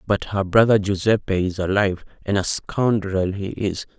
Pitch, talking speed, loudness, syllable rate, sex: 100 Hz, 165 wpm, -21 LUFS, 4.7 syllables/s, male